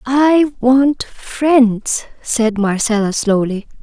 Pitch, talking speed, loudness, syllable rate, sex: 240 Hz, 95 wpm, -15 LUFS, 2.7 syllables/s, female